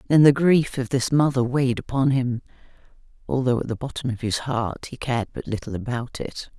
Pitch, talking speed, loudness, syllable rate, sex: 125 Hz, 200 wpm, -23 LUFS, 5.5 syllables/s, female